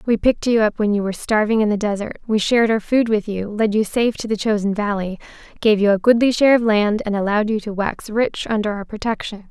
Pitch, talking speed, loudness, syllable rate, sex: 215 Hz, 250 wpm, -19 LUFS, 6.2 syllables/s, female